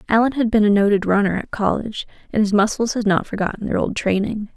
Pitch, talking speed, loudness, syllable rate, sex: 210 Hz, 225 wpm, -19 LUFS, 6.3 syllables/s, female